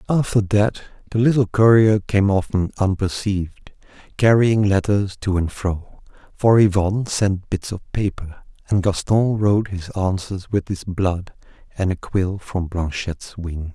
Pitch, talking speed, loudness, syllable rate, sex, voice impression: 100 Hz, 145 wpm, -20 LUFS, 4.3 syllables/s, male, very masculine, very middle-aged, relaxed, weak, dark, very soft, muffled, fluent, slightly raspy, cool, very intellectual, refreshing, sincere, very calm, very mature, very friendly, very reassuring, very unique, very elegant, wild, very sweet, slightly lively, very kind, very modest